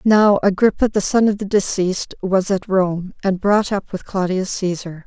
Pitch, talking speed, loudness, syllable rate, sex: 195 Hz, 190 wpm, -18 LUFS, 4.6 syllables/s, female